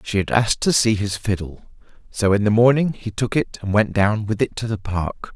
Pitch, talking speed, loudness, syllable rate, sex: 110 Hz, 245 wpm, -20 LUFS, 5.2 syllables/s, male